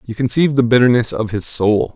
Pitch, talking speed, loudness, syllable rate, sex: 120 Hz, 215 wpm, -15 LUFS, 6.0 syllables/s, male